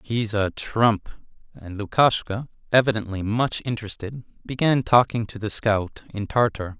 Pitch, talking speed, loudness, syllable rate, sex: 110 Hz, 130 wpm, -23 LUFS, 4.4 syllables/s, male